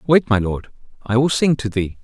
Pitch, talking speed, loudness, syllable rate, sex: 120 Hz, 235 wpm, -18 LUFS, 5.1 syllables/s, male